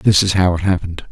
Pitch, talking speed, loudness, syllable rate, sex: 90 Hz, 270 wpm, -16 LUFS, 6.9 syllables/s, male